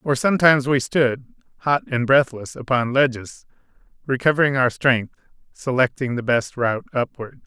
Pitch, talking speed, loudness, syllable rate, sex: 130 Hz, 135 wpm, -20 LUFS, 5.0 syllables/s, male